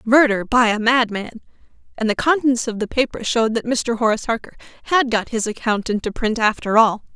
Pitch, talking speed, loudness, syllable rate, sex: 230 Hz, 195 wpm, -19 LUFS, 5.6 syllables/s, female